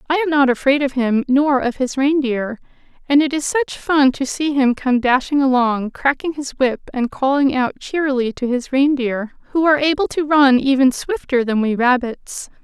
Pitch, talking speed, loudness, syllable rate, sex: 270 Hz, 195 wpm, -17 LUFS, 4.8 syllables/s, female